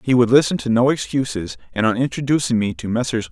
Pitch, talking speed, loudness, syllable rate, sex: 120 Hz, 215 wpm, -19 LUFS, 5.9 syllables/s, male